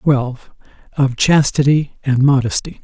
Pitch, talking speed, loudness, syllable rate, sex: 140 Hz, 105 wpm, -15 LUFS, 4.3 syllables/s, male